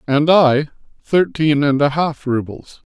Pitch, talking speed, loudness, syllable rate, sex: 145 Hz, 145 wpm, -16 LUFS, 3.8 syllables/s, male